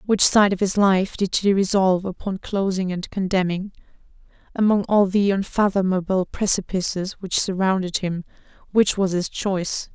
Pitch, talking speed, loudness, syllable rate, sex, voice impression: 190 Hz, 145 wpm, -21 LUFS, 4.9 syllables/s, female, slightly feminine, adult-like, fluent, sincere, calm